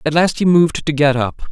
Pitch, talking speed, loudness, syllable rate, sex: 155 Hz, 275 wpm, -15 LUFS, 5.8 syllables/s, male